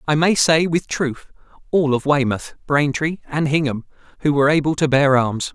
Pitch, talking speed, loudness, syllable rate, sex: 145 Hz, 185 wpm, -18 LUFS, 5.0 syllables/s, male